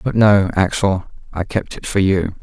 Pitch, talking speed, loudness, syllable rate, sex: 95 Hz, 200 wpm, -17 LUFS, 4.6 syllables/s, male